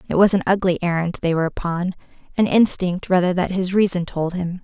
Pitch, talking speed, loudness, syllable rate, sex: 180 Hz, 205 wpm, -20 LUFS, 5.9 syllables/s, female